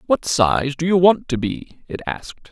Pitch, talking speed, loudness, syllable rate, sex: 145 Hz, 215 wpm, -19 LUFS, 4.4 syllables/s, male